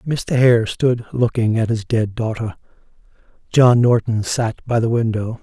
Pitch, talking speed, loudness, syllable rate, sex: 115 Hz, 155 wpm, -18 LUFS, 4.2 syllables/s, male